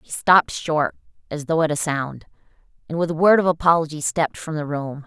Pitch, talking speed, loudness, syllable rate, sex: 155 Hz, 215 wpm, -20 LUFS, 5.8 syllables/s, female